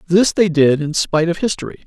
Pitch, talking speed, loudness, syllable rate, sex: 175 Hz, 225 wpm, -16 LUFS, 6.2 syllables/s, male